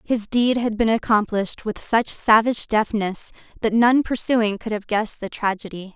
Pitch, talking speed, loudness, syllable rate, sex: 220 Hz, 170 wpm, -21 LUFS, 4.9 syllables/s, female